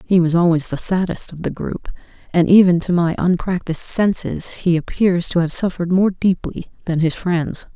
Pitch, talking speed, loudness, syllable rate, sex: 175 Hz, 185 wpm, -18 LUFS, 5.1 syllables/s, female